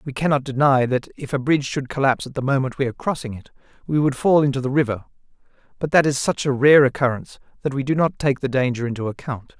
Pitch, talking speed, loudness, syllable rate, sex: 135 Hz, 240 wpm, -20 LUFS, 6.6 syllables/s, male